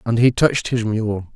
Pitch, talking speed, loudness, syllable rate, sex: 115 Hz, 220 wpm, -19 LUFS, 4.9 syllables/s, male